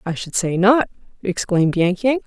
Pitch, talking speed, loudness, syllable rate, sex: 200 Hz, 185 wpm, -19 LUFS, 5.0 syllables/s, female